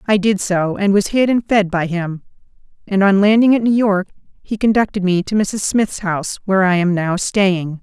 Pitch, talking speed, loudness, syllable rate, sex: 195 Hz, 215 wpm, -16 LUFS, 5.0 syllables/s, female